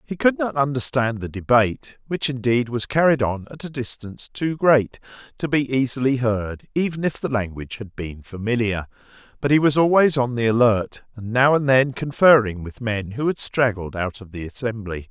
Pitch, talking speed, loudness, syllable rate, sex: 125 Hz, 190 wpm, -21 LUFS, 5.1 syllables/s, male